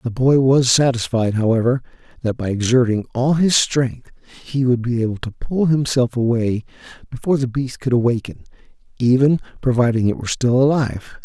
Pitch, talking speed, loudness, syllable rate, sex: 125 Hz, 160 wpm, -18 LUFS, 5.4 syllables/s, male